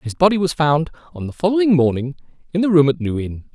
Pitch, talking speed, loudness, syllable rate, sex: 155 Hz, 235 wpm, -18 LUFS, 6.2 syllables/s, male